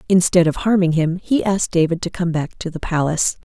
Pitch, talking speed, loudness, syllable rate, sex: 175 Hz, 225 wpm, -18 LUFS, 6.0 syllables/s, female